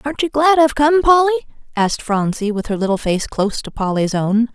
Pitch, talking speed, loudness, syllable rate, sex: 240 Hz, 210 wpm, -17 LUFS, 5.8 syllables/s, female